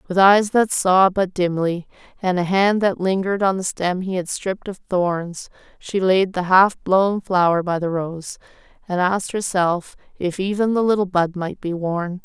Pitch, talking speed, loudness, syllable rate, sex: 185 Hz, 190 wpm, -19 LUFS, 4.5 syllables/s, female